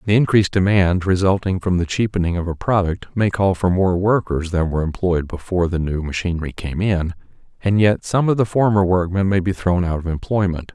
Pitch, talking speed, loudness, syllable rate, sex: 95 Hz, 205 wpm, -19 LUFS, 5.6 syllables/s, male